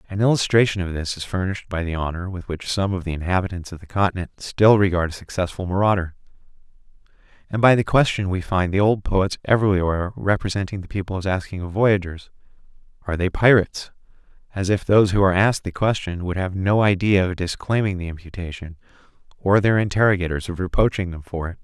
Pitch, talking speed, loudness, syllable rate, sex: 95 Hz, 180 wpm, -21 LUFS, 6.3 syllables/s, male